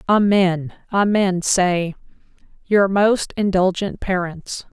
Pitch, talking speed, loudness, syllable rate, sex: 190 Hz, 90 wpm, -19 LUFS, 3.3 syllables/s, female